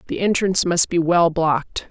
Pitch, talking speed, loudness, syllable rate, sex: 170 Hz, 190 wpm, -18 LUFS, 5.2 syllables/s, female